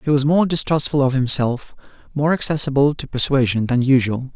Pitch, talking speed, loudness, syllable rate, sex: 140 Hz, 165 wpm, -18 LUFS, 5.5 syllables/s, male